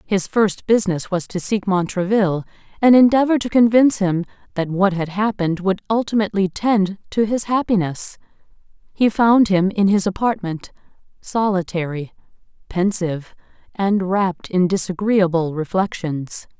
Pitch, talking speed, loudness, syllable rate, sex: 195 Hz, 125 wpm, -19 LUFS, 4.9 syllables/s, female